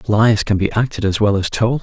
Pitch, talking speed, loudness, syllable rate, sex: 110 Hz, 265 wpm, -16 LUFS, 5.3 syllables/s, male